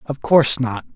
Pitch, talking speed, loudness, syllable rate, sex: 135 Hz, 190 wpm, -17 LUFS, 5.3 syllables/s, male